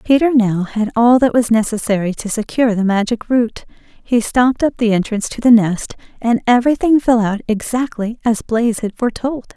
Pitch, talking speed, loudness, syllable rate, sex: 230 Hz, 180 wpm, -16 LUFS, 5.4 syllables/s, female